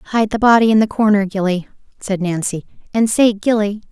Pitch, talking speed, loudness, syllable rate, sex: 205 Hz, 185 wpm, -16 LUFS, 5.3 syllables/s, female